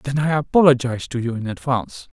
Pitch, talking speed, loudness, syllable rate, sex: 130 Hz, 190 wpm, -19 LUFS, 6.3 syllables/s, male